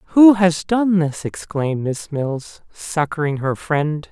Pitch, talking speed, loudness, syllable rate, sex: 165 Hz, 145 wpm, -19 LUFS, 3.7 syllables/s, male